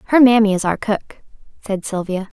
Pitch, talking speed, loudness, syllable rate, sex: 205 Hz, 175 wpm, -17 LUFS, 5.4 syllables/s, female